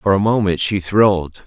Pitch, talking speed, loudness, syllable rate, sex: 95 Hz, 205 wpm, -16 LUFS, 4.9 syllables/s, male